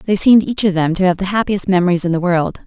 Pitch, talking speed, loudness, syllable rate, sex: 185 Hz, 295 wpm, -15 LUFS, 6.5 syllables/s, female